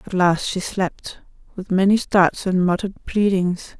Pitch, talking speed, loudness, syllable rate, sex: 185 Hz, 160 wpm, -20 LUFS, 4.2 syllables/s, female